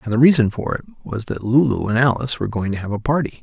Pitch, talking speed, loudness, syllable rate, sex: 120 Hz, 280 wpm, -19 LUFS, 7.1 syllables/s, male